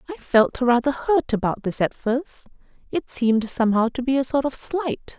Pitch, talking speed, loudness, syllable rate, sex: 255 Hz, 195 wpm, -22 LUFS, 4.9 syllables/s, female